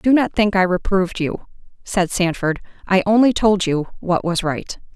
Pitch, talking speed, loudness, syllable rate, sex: 190 Hz, 180 wpm, -18 LUFS, 4.8 syllables/s, female